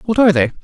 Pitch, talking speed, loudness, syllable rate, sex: 185 Hz, 285 wpm, -13 LUFS, 7.8 syllables/s, female